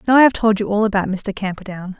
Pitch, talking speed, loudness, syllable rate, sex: 205 Hz, 270 wpm, -17 LUFS, 6.6 syllables/s, female